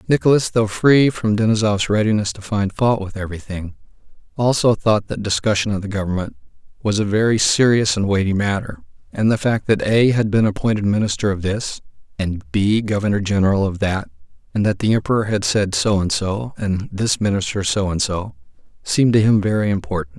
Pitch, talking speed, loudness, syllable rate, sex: 105 Hz, 185 wpm, -18 LUFS, 5.5 syllables/s, male